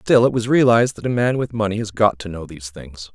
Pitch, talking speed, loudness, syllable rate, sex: 105 Hz, 285 wpm, -18 LUFS, 6.1 syllables/s, male